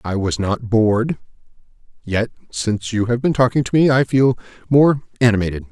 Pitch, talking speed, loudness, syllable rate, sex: 115 Hz, 170 wpm, -18 LUFS, 5.4 syllables/s, male